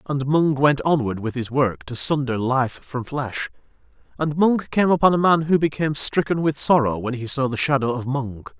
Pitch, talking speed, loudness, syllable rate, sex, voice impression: 135 Hz, 210 wpm, -21 LUFS, 5.0 syllables/s, male, masculine, middle-aged, tensed, powerful, slightly muffled, slightly raspy, cool, intellectual, mature, slightly friendly, wild, slightly strict, slightly intense